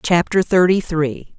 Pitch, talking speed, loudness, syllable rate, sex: 170 Hz, 130 wpm, -17 LUFS, 3.9 syllables/s, female